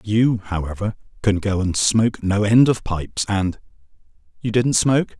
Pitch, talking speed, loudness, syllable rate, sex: 105 Hz, 150 wpm, -20 LUFS, 4.7 syllables/s, male